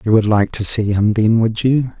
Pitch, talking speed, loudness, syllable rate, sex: 110 Hz, 270 wpm, -15 LUFS, 4.8 syllables/s, male